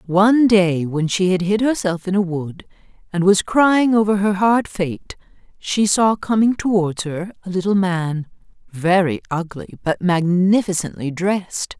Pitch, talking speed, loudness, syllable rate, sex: 190 Hz, 155 wpm, -18 LUFS, 4.3 syllables/s, female